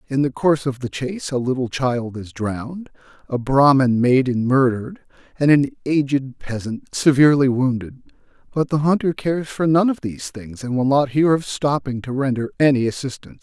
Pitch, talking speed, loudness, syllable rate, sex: 135 Hz, 180 wpm, -19 LUFS, 5.3 syllables/s, male